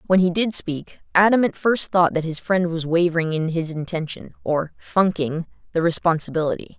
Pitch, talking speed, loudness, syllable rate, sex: 170 Hz, 175 wpm, -21 LUFS, 5.1 syllables/s, female